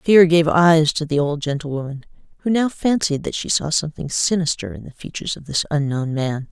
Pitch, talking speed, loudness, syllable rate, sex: 160 Hz, 205 wpm, -19 LUFS, 5.5 syllables/s, female